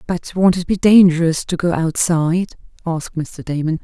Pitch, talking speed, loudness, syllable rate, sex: 170 Hz, 170 wpm, -16 LUFS, 5.1 syllables/s, female